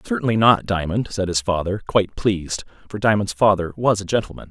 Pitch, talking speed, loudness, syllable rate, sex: 100 Hz, 185 wpm, -20 LUFS, 6.0 syllables/s, male